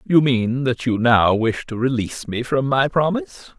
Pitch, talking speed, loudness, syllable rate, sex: 130 Hz, 200 wpm, -19 LUFS, 4.8 syllables/s, male